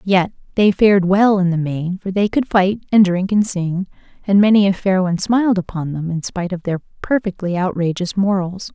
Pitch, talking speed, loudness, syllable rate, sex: 190 Hz, 205 wpm, -17 LUFS, 5.3 syllables/s, female